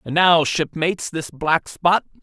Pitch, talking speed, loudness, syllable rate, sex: 165 Hz, 160 wpm, -19 LUFS, 4.1 syllables/s, male